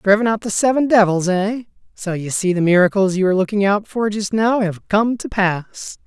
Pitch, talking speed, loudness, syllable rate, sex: 200 Hz, 220 wpm, -17 LUFS, 5.2 syllables/s, male